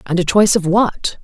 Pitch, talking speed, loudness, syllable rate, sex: 185 Hz, 240 wpm, -14 LUFS, 5.5 syllables/s, female